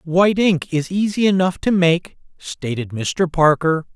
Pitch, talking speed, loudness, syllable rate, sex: 170 Hz, 150 wpm, -18 LUFS, 4.1 syllables/s, male